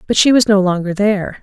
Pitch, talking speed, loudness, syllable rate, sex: 200 Hz, 255 wpm, -14 LUFS, 6.3 syllables/s, female